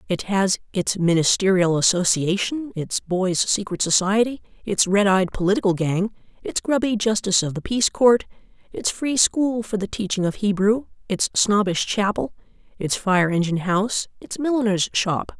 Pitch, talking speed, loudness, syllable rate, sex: 200 Hz, 150 wpm, -21 LUFS, 4.8 syllables/s, female